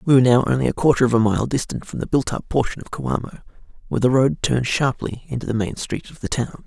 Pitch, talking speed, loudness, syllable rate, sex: 125 Hz, 260 wpm, -21 LUFS, 6.4 syllables/s, male